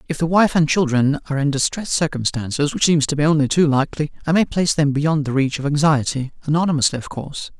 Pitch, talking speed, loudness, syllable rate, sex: 150 Hz, 215 wpm, -18 LUFS, 5.6 syllables/s, male